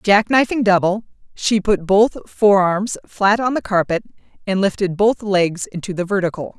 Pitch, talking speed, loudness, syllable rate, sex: 200 Hz, 155 wpm, -18 LUFS, 4.6 syllables/s, female